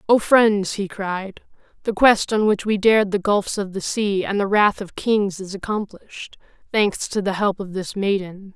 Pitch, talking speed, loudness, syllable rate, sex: 200 Hz, 205 wpm, -20 LUFS, 4.5 syllables/s, female